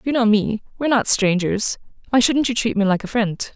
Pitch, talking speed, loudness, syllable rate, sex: 225 Hz, 200 wpm, -19 LUFS, 5.4 syllables/s, female